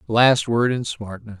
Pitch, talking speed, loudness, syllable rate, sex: 110 Hz, 170 wpm, -19 LUFS, 4.1 syllables/s, male